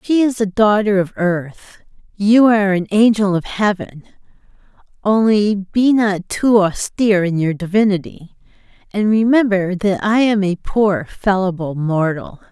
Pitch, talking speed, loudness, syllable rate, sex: 200 Hz, 140 wpm, -16 LUFS, 4.5 syllables/s, female